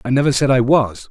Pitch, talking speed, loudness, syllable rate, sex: 125 Hz, 270 wpm, -15 LUFS, 5.9 syllables/s, male